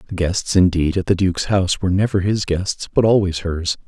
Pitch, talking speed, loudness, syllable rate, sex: 95 Hz, 215 wpm, -18 LUFS, 5.7 syllables/s, male